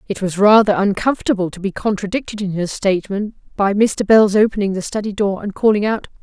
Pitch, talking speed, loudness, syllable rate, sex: 200 Hz, 195 wpm, -17 LUFS, 5.9 syllables/s, female